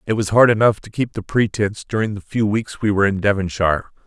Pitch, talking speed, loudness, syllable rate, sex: 105 Hz, 235 wpm, -19 LUFS, 6.4 syllables/s, male